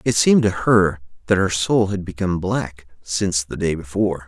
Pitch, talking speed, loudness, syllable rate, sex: 95 Hz, 195 wpm, -19 LUFS, 5.4 syllables/s, male